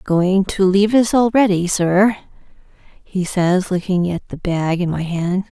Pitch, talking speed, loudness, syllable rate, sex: 190 Hz, 160 wpm, -17 LUFS, 4.0 syllables/s, female